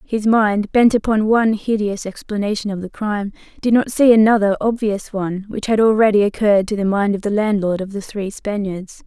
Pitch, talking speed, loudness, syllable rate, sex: 210 Hz, 200 wpm, -17 LUFS, 5.5 syllables/s, female